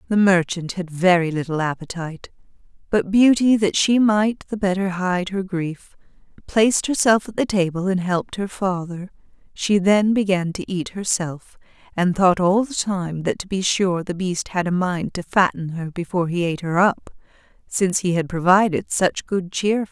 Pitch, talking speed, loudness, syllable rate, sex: 185 Hz, 185 wpm, -20 LUFS, 4.8 syllables/s, female